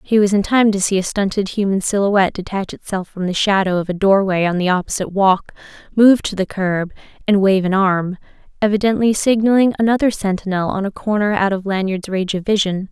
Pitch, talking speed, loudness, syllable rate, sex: 195 Hz, 195 wpm, -17 LUFS, 5.8 syllables/s, female